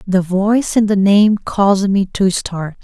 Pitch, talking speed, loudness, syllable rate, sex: 195 Hz, 190 wpm, -14 LUFS, 4.2 syllables/s, female